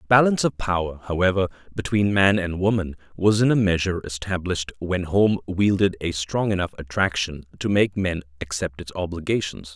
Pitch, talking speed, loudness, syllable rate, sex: 90 Hz, 160 wpm, -23 LUFS, 5.5 syllables/s, male